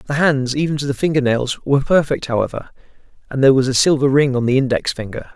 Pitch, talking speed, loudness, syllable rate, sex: 135 Hz, 225 wpm, -17 LUFS, 6.4 syllables/s, male